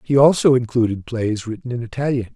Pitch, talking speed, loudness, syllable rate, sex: 120 Hz, 180 wpm, -19 LUFS, 5.8 syllables/s, male